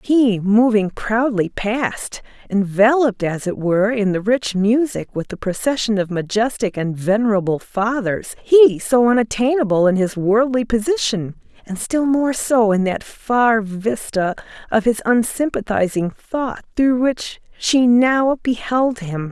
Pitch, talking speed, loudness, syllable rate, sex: 220 Hz, 140 wpm, -18 LUFS, 4.1 syllables/s, female